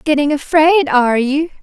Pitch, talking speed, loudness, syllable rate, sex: 295 Hz, 150 wpm, -13 LUFS, 4.9 syllables/s, female